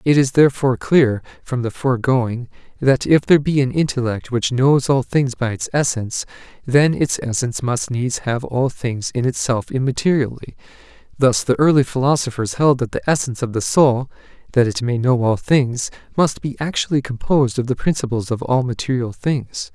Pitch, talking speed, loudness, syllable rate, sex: 130 Hz, 180 wpm, -18 LUFS, 5.2 syllables/s, male